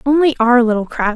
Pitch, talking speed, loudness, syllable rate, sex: 245 Hz, 205 wpm, -14 LUFS, 5.8 syllables/s, female